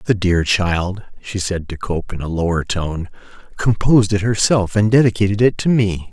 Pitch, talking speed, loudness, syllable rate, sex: 100 Hz, 185 wpm, -17 LUFS, 4.9 syllables/s, male